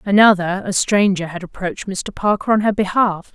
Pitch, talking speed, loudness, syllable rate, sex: 195 Hz, 180 wpm, -17 LUFS, 5.2 syllables/s, female